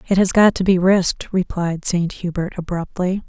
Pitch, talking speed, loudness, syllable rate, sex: 180 Hz, 185 wpm, -18 LUFS, 4.9 syllables/s, female